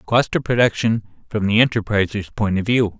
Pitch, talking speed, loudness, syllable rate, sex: 105 Hz, 180 wpm, -19 LUFS, 5.3 syllables/s, male